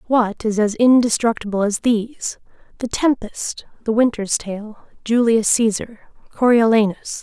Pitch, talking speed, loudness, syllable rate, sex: 225 Hz, 115 wpm, -18 LUFS, 4.3 syllables/s, female